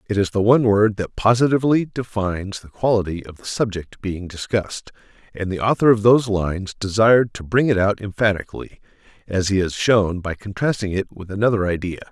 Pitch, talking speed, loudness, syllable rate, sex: 105 Hz, 185 wpm, -20 LUFS, 5.8 syllables/s, male